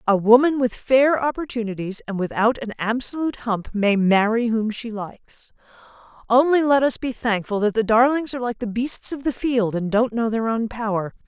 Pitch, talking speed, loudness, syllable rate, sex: 230 Hz, 190 wpm, -21 LUFS, 5.1 syllables/s, female